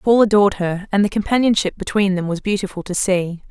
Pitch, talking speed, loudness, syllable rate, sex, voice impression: 195 Hz, 205 wpm, -18 LUFS, 6.0 syllables/s, female, very feminine, slightly young, adult-like, thin, slightly tensed, powerful, bright, soft, very clear, very fluent, very cute, intellectual, refreshing, very sincere, calm, very friendly, very reassuring, very unique, elegant, sweet, lively, slightly strict, slightly intense, modest, light